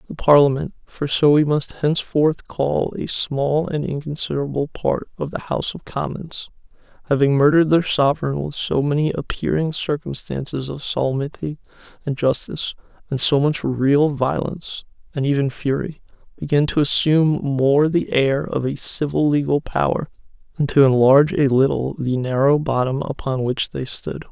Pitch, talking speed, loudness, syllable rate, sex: 145 Hz, 150 wpm, -20 LUFS, 5.0 syllables/s, male